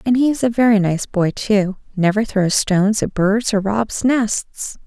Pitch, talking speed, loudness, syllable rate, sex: 210 Hz, 185 wpm, -17 LUFS, 4.2 syllables/s, female